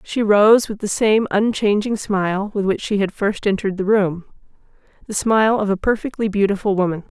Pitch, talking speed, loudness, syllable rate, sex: 205 Hz, 175 wpm, -18 LUFS, 5.4 syllables/s, female